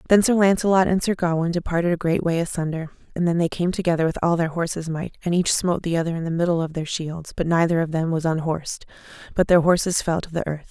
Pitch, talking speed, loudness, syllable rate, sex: 170 Hz, 250 wpm, -22 LUFS, 6.5 syllables/s, female